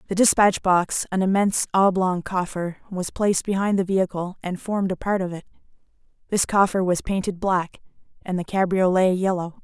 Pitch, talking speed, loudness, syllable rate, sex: 185 Hz, 170 wpm, -22 LUFS, 5.4 syllables/s, female